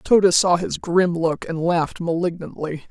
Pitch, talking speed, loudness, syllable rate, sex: 170 Hz, 165 wpm, -20 LUFS, 4.2 syllables/s, female